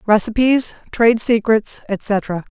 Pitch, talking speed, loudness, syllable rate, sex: 220 Hz, 95 wpm, -17 LUFS, 3.8 syllables/s, female